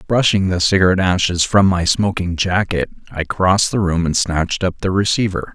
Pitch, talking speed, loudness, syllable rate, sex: 90 Hz, 185 wpm, -16 LUFS, 5.4 syllables/s, male